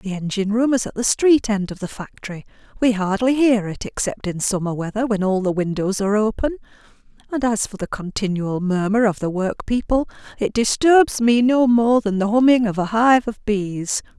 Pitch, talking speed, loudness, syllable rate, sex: 215 Hz, 205 wpm, -19 LUFS, 5.2 syllables/s, female